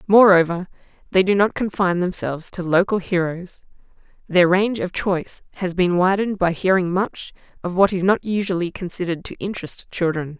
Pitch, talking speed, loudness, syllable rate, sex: 180 Hz, 160 wpm, -20 LUFS, 5.6 syllables/s, female